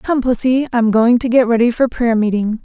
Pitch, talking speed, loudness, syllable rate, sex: 240 Hz, 225 wpm, -14 LUFS, 5.1 syllables/s, female